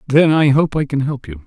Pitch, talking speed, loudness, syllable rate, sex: 140 Hz, 285 wpm, -15 LUFS, 5.3 syllables/s, male